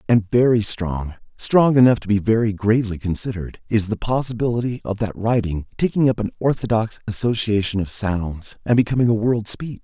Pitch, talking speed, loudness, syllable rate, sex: 110 Hz, 160 wpm, -20 LUFS, 5.4 syllables/s, male